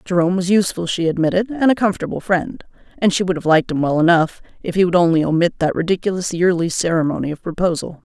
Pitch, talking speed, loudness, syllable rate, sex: 175 Hz, 205 wpm, -18 LUFS, 6.7 syllables/s, female